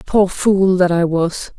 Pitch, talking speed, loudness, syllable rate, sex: 185 Hz, 190 wpm, -15 LUFS, 3.5 syllables/s, female